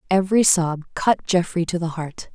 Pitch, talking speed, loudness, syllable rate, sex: 175 Hz, 180 wpm, -20 LUFS, 4.9 syllables/s, female